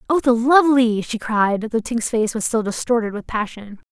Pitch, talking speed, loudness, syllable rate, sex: 230 Hz, 200 wpm, -19 LUFS, 5.0 syllables/s, female